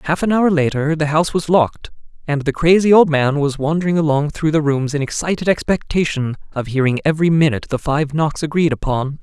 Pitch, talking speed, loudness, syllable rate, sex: 155 Hz, 200 wpm, -17 LUFS, 5.9 syllables/s, male